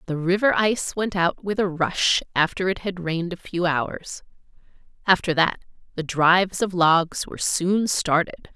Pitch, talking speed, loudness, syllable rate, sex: 180 Hz, 170 wpm, -22 LUFS, 4.6 syllables/s, female